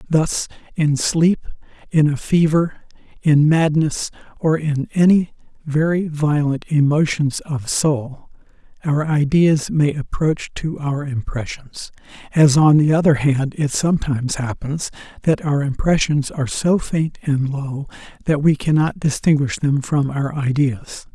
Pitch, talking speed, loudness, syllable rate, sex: 150 Hz, 135 wpm, -18 LUFS, 4.0 syllables/s, male